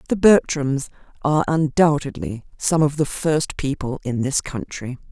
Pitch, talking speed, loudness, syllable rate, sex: 145 Hz, 140 wpm, -21 LUFS, 4.4 syllables/s, female